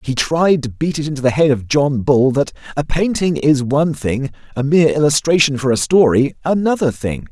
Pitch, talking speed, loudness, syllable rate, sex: 145 Hz, 205 wpm, -16 LUFS, 5.3 syllables/s, male